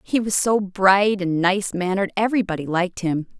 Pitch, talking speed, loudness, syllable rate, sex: 190 Hz, 175 wpm, -20 LUFS, 5.4 syllables/s, female